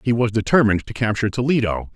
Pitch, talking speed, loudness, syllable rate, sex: 115 Hz, 185 wpm, -19 LUFS, 7.1 syllables/s, male